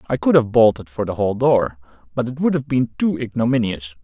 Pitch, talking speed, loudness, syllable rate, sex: 120 Hz, 225 wpm, -19 LUFS, 5.7 syllables/s, male